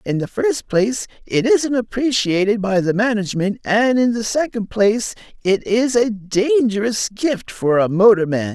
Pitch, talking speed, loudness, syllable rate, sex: 215 Hz, 170 wpm, -18 LUFS, 4.5 syllables/s, male